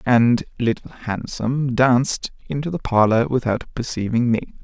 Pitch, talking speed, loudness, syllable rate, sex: 120 Hz, 130 wpm, -20 LUFS, 4.6 syllables/s, male